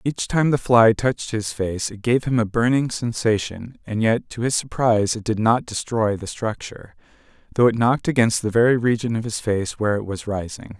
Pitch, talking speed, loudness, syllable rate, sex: 115 Hz, 210 wpm, -21 LUFS, 5.3 syllables/s, male